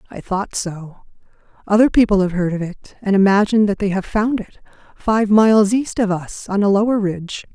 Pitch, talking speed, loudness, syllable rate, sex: 205 Hz, 185 wpm, -17 LUFS, 5.3 syllables/s, female